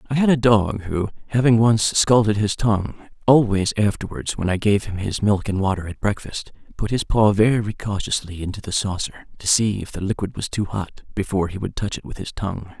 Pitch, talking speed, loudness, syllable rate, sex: 105 Hz, 215 wpm, -21 LUFS, 5.5 syllables/s, male